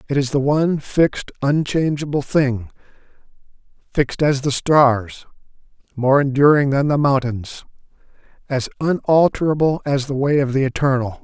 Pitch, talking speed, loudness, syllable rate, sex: 140 Hz, 125 wpm, -18 LUFS, 4.8 syllables/s, male